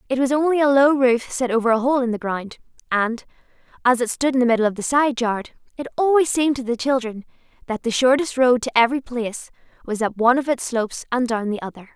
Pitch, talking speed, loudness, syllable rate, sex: 245 Hz, 235 wpm, -20 LUFS, 6.2 syllables/s, female